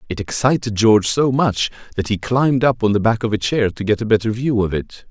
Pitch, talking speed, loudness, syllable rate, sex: 115 Hz, 260 wpm, -18 LUFS, 5.8 syllables/s, male